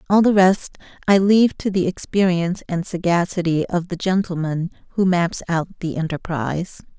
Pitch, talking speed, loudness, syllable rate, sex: 180 Hz, 155 wpm, -20 LUFS, 5.1 syllables/s, female